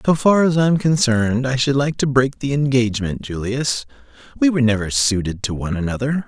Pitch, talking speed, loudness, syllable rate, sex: 125 Hz, 200 wpm, -18 LUFS, 5.8 syllables/s, male